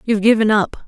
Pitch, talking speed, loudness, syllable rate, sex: 215 Hz, 205 wpm, -15 LUFS, 6.5 syllables/s, female